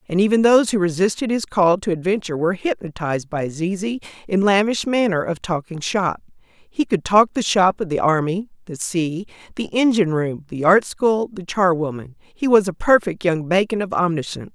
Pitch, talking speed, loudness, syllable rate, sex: 185 Hz, 190 wpm, -19 LUFS, 5.4 syllables/s, female